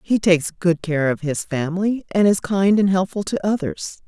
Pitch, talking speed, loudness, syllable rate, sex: 185 Hz, 205 wpm, -20 LUFS, 5.1 syllables/s, female